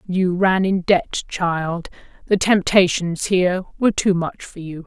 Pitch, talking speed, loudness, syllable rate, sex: 180 Hz, 160 wpm, -19 LUFS, 4.1 syllables/s, female